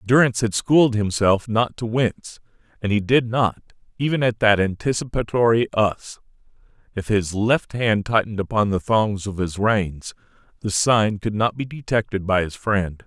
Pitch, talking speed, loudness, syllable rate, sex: 110 Hz, 165 wpm, -21 LUFS, 4.8 syllables/s, male